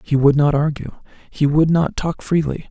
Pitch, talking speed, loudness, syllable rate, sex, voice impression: 150 Hz, 200 wpm, -18 LUFS, 4.9 syllables/s, male, masculine, adult-like, relaxed, slightly dark, soft, raspy, cool, intellectual, calm, friendly, reassuring, kind, modest